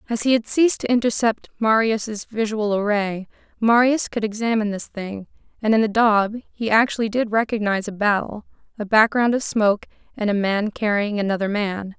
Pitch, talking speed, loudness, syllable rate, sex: 215 Hz, 170 wpm, -20 LUFS, 5.2 syllables/s, female